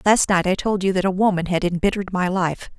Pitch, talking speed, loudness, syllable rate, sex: 190 Hz, 260 wpm, -20 LUFS, 6.1 syllables/s, female